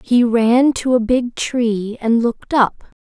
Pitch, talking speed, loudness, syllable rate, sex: 235 Hz, 180 wpm, -16 LUFS, 3.6 syllables/s, female